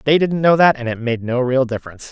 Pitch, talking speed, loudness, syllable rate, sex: 135 Hz, 315 wpm, -17 LUFS, 7.0 syllables/s, male